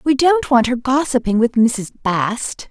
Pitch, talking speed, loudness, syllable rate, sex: 245 Hz, 175 wpm, -17 LUFS, 4.0 syllables/s, female